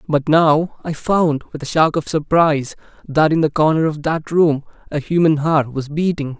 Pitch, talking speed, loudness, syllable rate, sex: 155 Hz, 195 wpm, -17 LUFS, 4.7 syllables/s, male